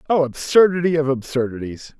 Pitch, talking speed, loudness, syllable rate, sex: 145 Hz, 120 wpm, -18 LUFS, 5.6 syllables/s, male